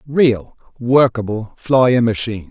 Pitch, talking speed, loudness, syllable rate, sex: 120 Hz, 95 wpm, -16 LUFS, 3.8 syllables/s, male